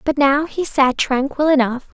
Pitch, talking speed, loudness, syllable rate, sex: 280 Hz, 180 wpm, -17 LUFS, 4.4 syllables/s, female